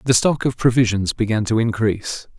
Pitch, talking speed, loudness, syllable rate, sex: 115 Hz, 175 wpm, -19 LUFS, 5.5 syllables/s, male